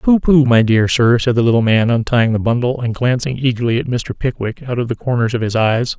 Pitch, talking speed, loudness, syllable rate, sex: 120 Hz, 250 wpm, -15 LUFS, 5.6 syllables/s, male